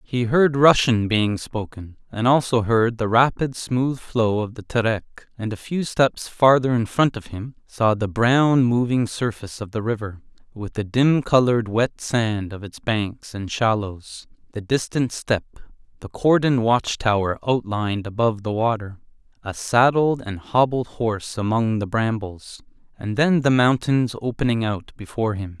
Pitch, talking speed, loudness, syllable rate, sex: 115 Hz, 165 wpm, -21 LUFS, 4.4 syllables/s, male